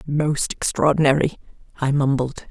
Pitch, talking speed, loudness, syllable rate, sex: 145 Hz, 95 wpm, -20 LUFS, 4.6 syllables/s, female